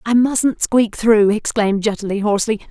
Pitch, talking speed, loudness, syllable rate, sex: 215 Hz, 155 wpm, -16 LUFS, 5.2 syllables/s, female